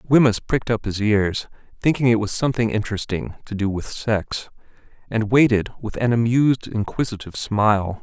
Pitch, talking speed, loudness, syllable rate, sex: 110 Hz, 155 wpm, -21 LUFS, 5.5 syllables/s, male